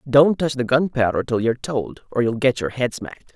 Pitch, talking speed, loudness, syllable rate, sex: 130 Hz, 230 wpm, -20 LUFS, 5.4 syllables/s, male